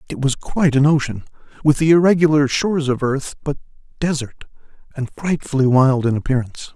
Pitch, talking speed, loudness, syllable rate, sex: 140 Hz, 160 wpm, -18 LUFS, 5.7 syllables/s, male